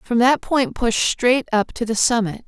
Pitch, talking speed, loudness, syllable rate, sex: 230 Hz, 220 wpm, -19 LUFS, 4.2 syllables/s, female